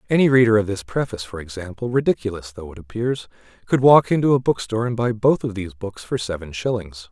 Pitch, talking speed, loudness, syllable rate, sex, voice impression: 110 Hz, 210 wpm, -20 LUFS, 6.3 syllables/s, male, masculine, adult-like, slightly middle-aged, tensed, slightly weak, bright, soft, slightly muffled, fluent, slightly raspy, cool, intellectual, slightly refreshing, slightly sincere, slightly calm, mature, friendly, reassuring, elegant, sweet, slightly lively, kind